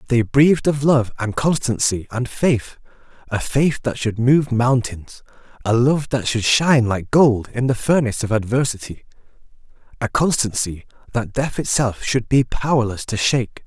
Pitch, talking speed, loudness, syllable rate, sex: 125 Hz, 160 wpm, -19 LUFS, 4.7 syllables/s, male